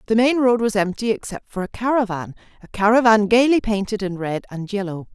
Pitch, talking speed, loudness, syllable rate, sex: 215 Hz, 185 wpm, -20 LUFS, 5.7 syllables/s, female